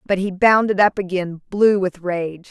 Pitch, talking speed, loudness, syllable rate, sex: 190 Hz, 190 wpm, -18 LUFS, 4.4 syllables/s, female